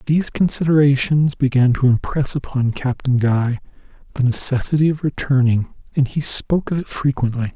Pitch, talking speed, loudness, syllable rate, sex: 135 Hz, 145 wpm, -18 LUFS, 5.3 syllables/s, male